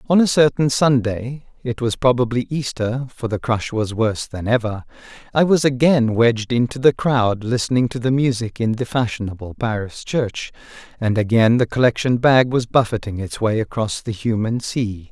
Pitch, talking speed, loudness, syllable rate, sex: 120 Hz, 165 wpm, -19 LUFS, 5.0 syllables/s, male